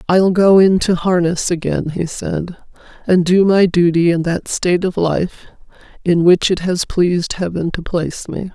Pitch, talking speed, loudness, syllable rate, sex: 175 Hz, 175 wpm, -15 LUFS, 4.5 syllables/s, female